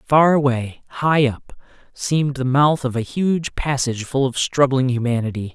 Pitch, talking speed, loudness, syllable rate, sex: 135 Hz, 160 wpm, -19 LUFS, 4.8 syllables/s, male